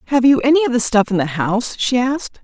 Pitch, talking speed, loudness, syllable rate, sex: 245 Hz, 270 wpm, -16 LUFS, 6.5 syllables/s, female